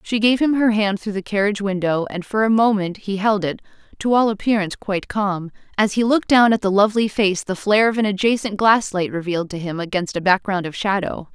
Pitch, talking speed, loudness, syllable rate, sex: 205 Hz, 225 wpm, -19 LUFS, 6.0 syllables/s, female